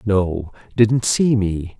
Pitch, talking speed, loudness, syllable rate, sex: 105 Hz, 135 wpm, -18 LUFS, 2.7 syllables/s, male